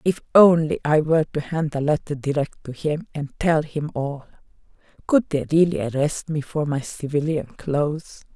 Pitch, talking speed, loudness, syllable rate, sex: 150 Hz, 170 wpm, -22 LUFS, 4.7 syllables/s, female